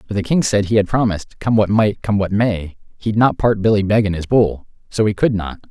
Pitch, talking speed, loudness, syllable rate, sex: 105 Hz, 265 wpm, -17 LUFS, 5.6 syllables/s, male